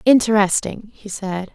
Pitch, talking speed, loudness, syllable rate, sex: 205 Hz, 115 wpm, -18 LUFS, 4.3 syllables/s, female